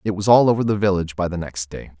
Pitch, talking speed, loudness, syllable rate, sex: 95 Hz, 300 wpm, -19 LUFS, 7.1 syllables/s, male